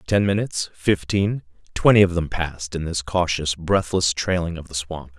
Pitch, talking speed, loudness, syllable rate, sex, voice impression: 85 Hz, 160 wpm, -21 LUFS, 5.0 syllables/s, male, very masculine, middle-aged, very thick, slightly relaxed, powerful, slightly bright, slightly soft, clear, fluent, slightly raspy, very cool, intellectual, refreshing, very sincere, very calm, very mature, very friendly, reassuring, unique, elegant, slightly wild, sweet, slightly lively, kind, slightly modest